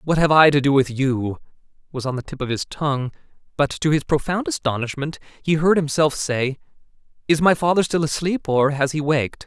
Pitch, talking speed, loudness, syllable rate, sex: 145 Hz, 205 wpm, -20 LUFS, 5.5 syllables/s, male